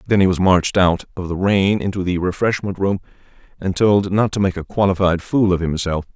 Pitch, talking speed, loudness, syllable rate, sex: 95 Hz, 215 wpm, -18 LUFS, 5.5 syllables/s, male